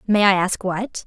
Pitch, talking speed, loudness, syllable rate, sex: 195 Hz, 225 wpm, -19 LUFS, 4.4 syllables/s, female